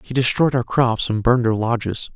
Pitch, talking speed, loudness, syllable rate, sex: 120 Hz, 225 wpm, -19 LUFS, 5.4 syllables/s, male